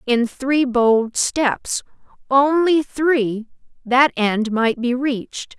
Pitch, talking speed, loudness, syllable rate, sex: 255 Hz, 95 wpm, -18 LUFS, 2.9 syllables/s, female